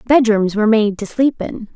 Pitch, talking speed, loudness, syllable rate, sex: 220 Hz, 205 wpm, -15 LUFS, 5.1 syllables/s, female